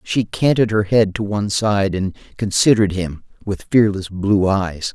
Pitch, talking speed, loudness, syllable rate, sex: 100 Hz, 170 wpm, -18 LUFS, 4.6 syllables/s, male